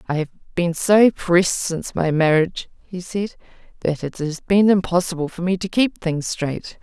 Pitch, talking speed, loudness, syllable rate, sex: 175 Hz, 185 wpm, -20 LUFS, 4.9 syllables/s, female